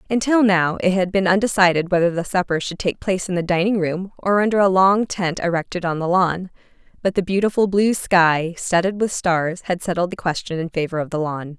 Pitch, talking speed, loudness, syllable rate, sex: 180 Hz, 215 wpm, -19 LUFS, 5.5 syllables/s, female